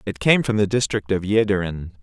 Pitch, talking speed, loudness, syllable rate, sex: 100 Hz, 205 wpm, -20 LUFS, 5.5 syllables/s, male